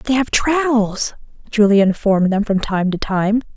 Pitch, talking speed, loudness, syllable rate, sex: 215 Hz, 170 wpm, -17 LUFS, 4.6 syllables/s, female